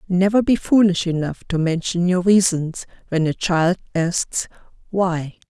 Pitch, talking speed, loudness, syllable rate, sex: 180 Hz, 140 wpm, -19 LUFS, 4.1 syllables/s, female